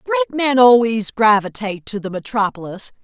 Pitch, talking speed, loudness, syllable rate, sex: 230 Hz, 140 wpm, -17 LUFS, 6.0 syllables/s, female